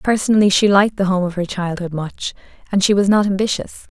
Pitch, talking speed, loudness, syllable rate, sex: 195 Hz, 210 wpm, -17 LUFS, 6.0 syllables/s, female